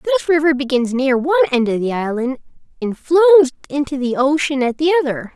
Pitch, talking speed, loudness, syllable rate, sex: 280 Hz, 190 wpm, -16 LUFS, 6.7 syllables/s, female